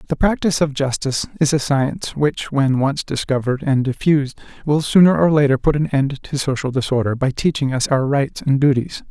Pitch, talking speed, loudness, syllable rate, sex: 140 Hz, 200 wpm, -18 LUFS, 5.5 syllables/s, male